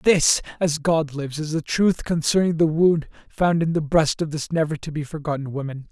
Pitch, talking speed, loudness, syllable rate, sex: 155 Hz, 215 wpm, -22 LUFS, 5.1 syllables/s, male